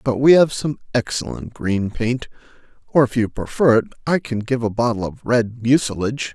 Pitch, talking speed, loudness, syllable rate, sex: 120 Hz, 190 wpm, -19 LUFS, 5.1 syllables/s, male